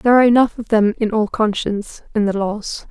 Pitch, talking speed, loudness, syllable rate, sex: 220 Hz, 225 wpm, -17 LUFS, 5.9 syllables/s, female